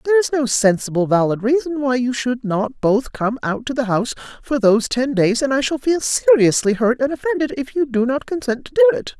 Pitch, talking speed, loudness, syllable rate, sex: 255 Hz, 235 wpm, -18 LUFS, 5.6 syllables/s, female